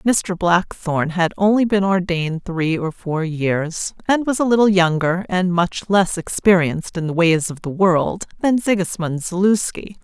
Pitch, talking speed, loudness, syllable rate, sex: 180 Hz, 165 wpm, -18 LUFS, 4.4 syllables/s, female